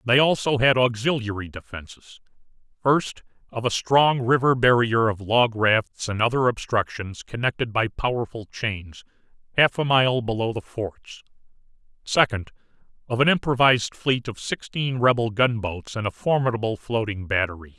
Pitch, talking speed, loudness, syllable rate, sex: 115 Hz, 140 wpm, -22 LUFS, 4.7 syllables/s, male